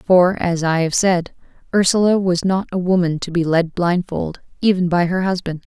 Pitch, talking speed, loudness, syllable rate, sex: 180 Hz, 190 wpm, -18 LUFS, 4.8 syllables/s, female